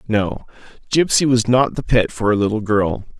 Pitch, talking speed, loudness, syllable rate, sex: 115 Hz, 190 wpm, -17 LUFS, 4.9 syllables/s, male